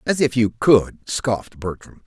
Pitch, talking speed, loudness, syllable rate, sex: 120 Hz, 175 wpm, -20 LUFS, 4.3 syllables/s, male